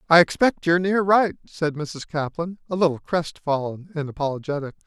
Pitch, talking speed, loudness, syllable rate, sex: 160 Hz, 160 wpm, -23 LUFS, 5.5 syllables/s, male